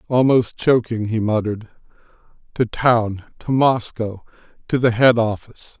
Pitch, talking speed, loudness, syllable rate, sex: 115 Hz, 105 wpm, -18 LUFS, 4.5 syllables/s, male